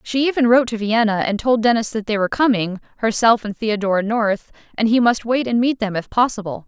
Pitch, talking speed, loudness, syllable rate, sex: 225 Hz, 225 wpm, -18 LUFS, 5.9 syllables/s, female